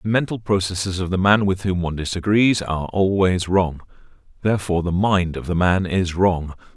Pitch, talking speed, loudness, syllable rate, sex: 95 Hz, 185 wpm, -20 LUFS, 5.4 syllables/s, male